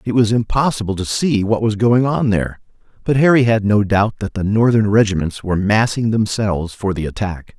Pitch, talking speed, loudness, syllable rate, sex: 110 Hz, 200 wpm, -16 LUFS, 5.4 syllables/s, male